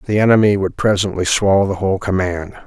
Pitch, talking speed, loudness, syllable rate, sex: 95 Hz, 180 wpm, -16 LUFS, 6.3 syllables/s, male